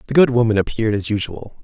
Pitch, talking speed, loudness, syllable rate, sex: 110 Hz, 220 wpm, -18 LUFS, 7.1 syllables/s, male